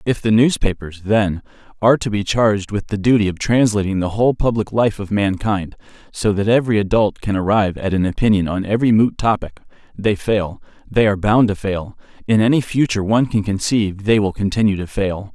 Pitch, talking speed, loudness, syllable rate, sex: 105 Hz, 195 wpm, -17 LUFS, 5.8 syllables/s, male